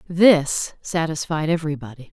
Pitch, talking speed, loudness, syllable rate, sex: 160 Hz, 80 wpm, -20 LUFS, 4.7 syllables/s, female